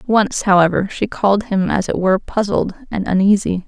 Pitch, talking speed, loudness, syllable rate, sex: 200 Hz, 180 wpm, -17 LUFS, 5.3 syllables/s, female